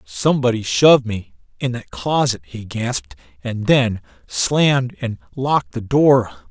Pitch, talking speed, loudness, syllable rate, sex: 125 Hz, 100 wpm, -18 LUFS, 4.4 syllables/s, male